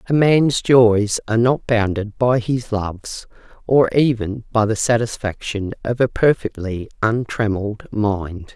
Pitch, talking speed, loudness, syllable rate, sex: 115 Hz, 135 wpm, -18 LUFS, 4.1 syllables/s, female